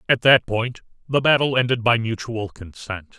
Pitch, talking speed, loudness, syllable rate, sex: 115 Hz, 170 wpm, -20 LUFS, 4.7 syllables/s, male